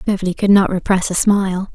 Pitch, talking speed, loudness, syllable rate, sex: 190 Hz, 205 wpm, -16 LUFS, 6.1 syllables/s, female